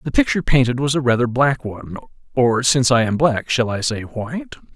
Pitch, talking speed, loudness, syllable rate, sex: 130 Hz, 200 wpm, -18 LUFS, 5.9 syllables/s, male